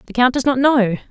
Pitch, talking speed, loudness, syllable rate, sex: 250 Hz, 270 wpm, -16 LUFS, 6.0 syllables/s, female